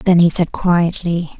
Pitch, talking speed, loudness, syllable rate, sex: 170 Hz, 175 wpm, -16 LUFS, 4.0 syllables/s, female